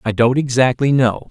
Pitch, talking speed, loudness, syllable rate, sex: 125 Hz, 185 wpm, -15 LUFS, 5.0 syllables/s, male